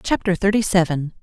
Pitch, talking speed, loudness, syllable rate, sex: 185 Hz, 145 wpm, -19 LUFS, 5.6 syllables/s, female